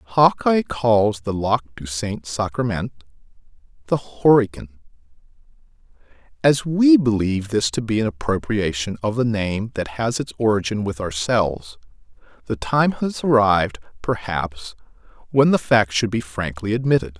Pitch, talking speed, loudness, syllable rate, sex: 110 Hz, 135 wpm, -20 LUFS, 4.5 syllables/s, male